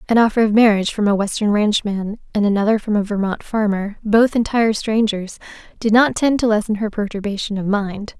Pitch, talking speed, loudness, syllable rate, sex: 210 Hz, 190 wpm, -18 LUFS, 5.3 syllables/s, female